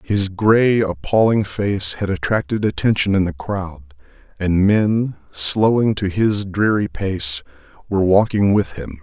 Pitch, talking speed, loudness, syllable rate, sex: 95 Hz, 140 wpm, -18 LUFS, 4.0 syllables/s, male